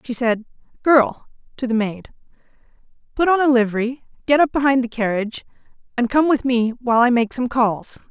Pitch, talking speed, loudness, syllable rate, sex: 245 Hz, 180 wpm, -19 LUFS, 5.5 syllables/s, female